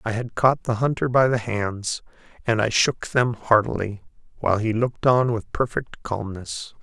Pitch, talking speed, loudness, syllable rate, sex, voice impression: 115 Hz, 175 wpm, -23 LUFS, 4.6 syllables/s, male, very masculine, very middle-aged, very thick, slightly relaxed, powerful, bright, soft, slightly muffled, fluent, cool, intellectual, slightly refreshing, sincere, calm, slightly mature, friendly, reassuring, unique, elegant, slightly wild, slightly sweet, lively, kind, slightly modest